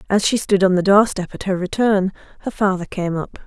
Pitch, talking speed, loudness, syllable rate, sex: 195 Hz, 245 wpm, -18 LUFS, 5.5 syllables/s, female